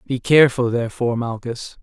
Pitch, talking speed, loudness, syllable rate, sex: 120 Hz, 130 wpm, -18 LUFS, 5.9 syllables/s, male